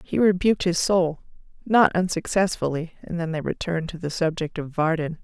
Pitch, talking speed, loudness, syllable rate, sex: 170 Hz, 170 wpm, -23 LUFS, 5.4 syllables/s, female